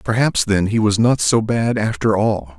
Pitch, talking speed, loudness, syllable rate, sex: 105 Hz, 210 wpm, -17 LUFS, 4.4 syllables/s, male